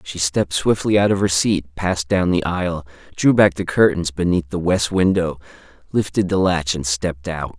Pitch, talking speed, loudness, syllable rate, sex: 85 Hz, 200 wpm, -19 LUFS, 5.1 syllables/s, male